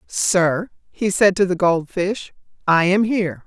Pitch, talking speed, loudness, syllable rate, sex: 190 Hz, 155 wpm, -19 LUFS, 3.9 syllables/s, female